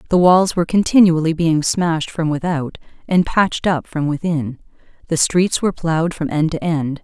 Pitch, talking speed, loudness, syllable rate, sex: 165 Hz, 180 wpm, -17 LUFS, 5.1 syllables/s, female